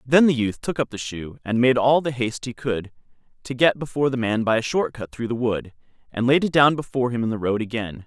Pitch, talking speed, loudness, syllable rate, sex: 120 Hz, 270 wpm, -22 LUFS, 6.0 syllables/s, male